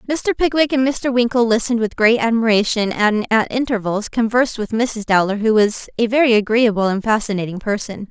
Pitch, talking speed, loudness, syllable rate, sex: 225 Hz, 180 wpm, -17 LUFS, 5.5 syllables/s, female